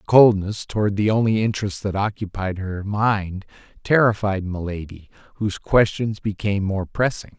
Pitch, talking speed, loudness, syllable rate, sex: 100 Hz, 140 wpm, -21 LUFS, 5.0 syllables/s, male